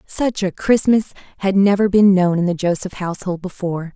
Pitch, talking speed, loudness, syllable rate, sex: 190 Hz, 180 wpm, -17 LUFS, 5.6 syllables/s, female